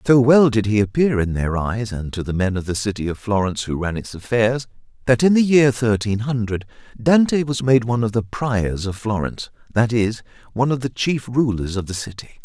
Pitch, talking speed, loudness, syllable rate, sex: 115 Hz, 220 wpm, -19 LUFS, 5.5 syllables/s, male